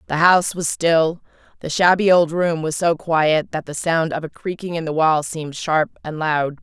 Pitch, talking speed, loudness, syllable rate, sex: 165 Hz, 215 wpm, -19 LUFS, 4.8 syllables/s, female